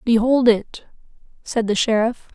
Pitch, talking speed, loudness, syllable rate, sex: 230 Hz, 130 wpm, -19 LUFS, 4.2 syllables/s, female